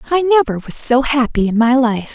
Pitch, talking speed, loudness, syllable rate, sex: 255 Hz, 225 wpm, -15 LUFS, 5.5 syllables/s, female